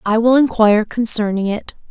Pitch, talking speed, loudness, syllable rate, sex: 220 Hz, 155 wpm, -15 LUFS, 5.4 syllables/s, female